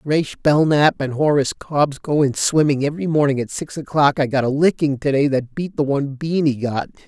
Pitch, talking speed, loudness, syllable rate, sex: 145 Hz, 205 wpm, -19 LUFS, 5.3 syllables/s, male